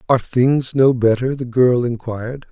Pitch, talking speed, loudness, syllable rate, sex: 125 Hz, 165 wpm, -17 LUFS, 4.7 syllables/s, male